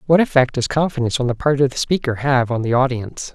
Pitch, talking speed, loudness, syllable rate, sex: 130 Hz, 250 wpm, -18 LUFS, 6.6 syllables/s, male